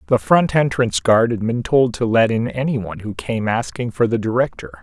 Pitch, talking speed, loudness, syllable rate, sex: 110 Hz, 210 wpm, -18 LUFS, 5.2 syllables/s, male